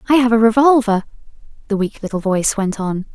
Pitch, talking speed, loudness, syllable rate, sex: 220 Hz, 190 wpm, -16 LUFS, 6.3 syllables/s, female